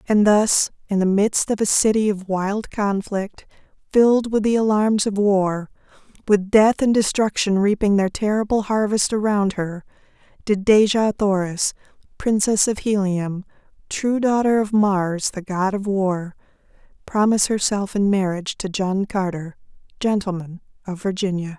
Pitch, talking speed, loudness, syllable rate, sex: 200 Hz, 140 wpm, -20 LUFS, 4.4 syllables/s, female